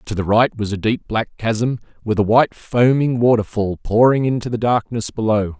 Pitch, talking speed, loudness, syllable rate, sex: 115 Hz, 195 wpm, -18 LUFS, 5.0 syllables/s, male